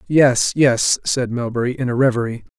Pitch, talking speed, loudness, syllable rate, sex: 125 Hz, 165 wpm, -18 LUFS, 4.9 syllables/s, male